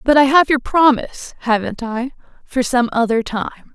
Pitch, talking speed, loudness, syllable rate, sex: 250 Hz, 145 wpm, -17 LUFS, 5.1 syllables/s, female